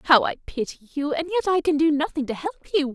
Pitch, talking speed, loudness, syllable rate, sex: 290 Hz, 265 wpm, -24 LUFS, 7.9 syllables/s, female